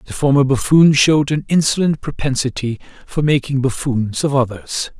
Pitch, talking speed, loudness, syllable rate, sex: 135 Hz, 145 wpm, -16 LUFS, 5.1 syllables/s, male